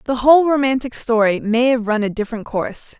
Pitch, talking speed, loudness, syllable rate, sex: 240 Hz, 200 wpm, -17 LUFS, 6.0 syllables/s, female